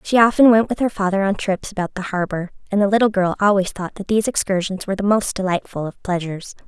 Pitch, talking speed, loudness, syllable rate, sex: 195 Hz, 235 wpm, -19 LUFS, 6.4 syllables/s, female